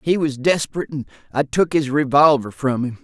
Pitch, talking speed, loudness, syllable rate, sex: 140 Hz, 200 wpm, -19 LUFS, 5.7 syllables/s, male